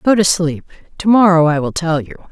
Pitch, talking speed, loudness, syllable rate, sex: 170 Hz, 235 wpm, -14 LUFS, 5.8 syllables/s, female